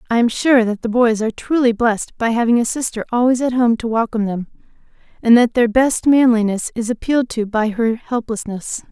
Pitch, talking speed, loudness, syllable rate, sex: 235 Hz, 200 wpm, -17 LUFS, 5.6 syllables/s, female